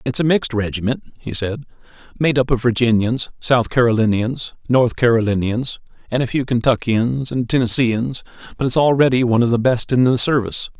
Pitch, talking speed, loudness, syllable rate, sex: 120 Hz, 165 wpm, -18 LUFS, 5.5 syllables/s, male